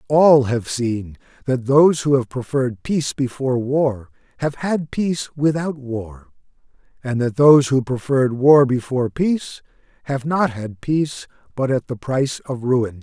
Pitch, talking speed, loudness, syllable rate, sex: 130 Hz, 155 wpm, -19 LUFS, 4.7 syllables/s, male